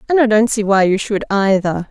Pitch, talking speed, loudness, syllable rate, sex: 210 Hz, 250 wpm, -15 LUFS, 5.4 syllables/s, female